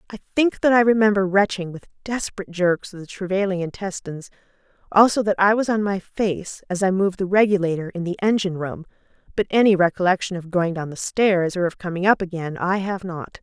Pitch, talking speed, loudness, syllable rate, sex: 190 Hz, 200 wpm, -21 LUFS, 5.9 syllables/s, female